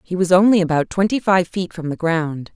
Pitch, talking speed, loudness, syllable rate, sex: 180 Hz, 235 wpm, -18 LUFS, 5.3 syllables/s, female